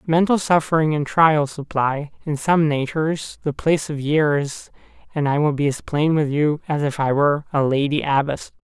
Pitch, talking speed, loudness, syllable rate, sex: 150 Hz, 190 wpm, -20 LUFS, 4.8 syllables/s, male